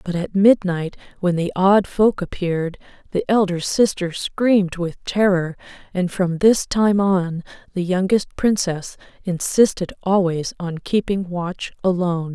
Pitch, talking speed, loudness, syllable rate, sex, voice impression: 185 Hz, 135 wpm, -20 LUFS, 4.2 syllables/s, female, feminine, adult-like, tensed, powerful, bright, slightly hard, clear, intellectual, friendly, reassuring, elegant, lively, slightly sharp